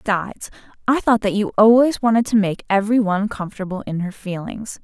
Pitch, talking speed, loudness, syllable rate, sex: 210 Hz, 185 wpm, -19 LUFS, 6.1 syllables/s, female